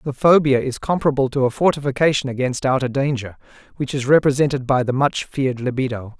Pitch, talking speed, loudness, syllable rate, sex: 135 Hz, 175 wpm, -19 LUFS, 6.1 syllables/s, male